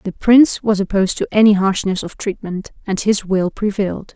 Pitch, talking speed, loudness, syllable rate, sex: 200 Hz, 190 wpm, -16 LUFS, 5.4 syllables/s, female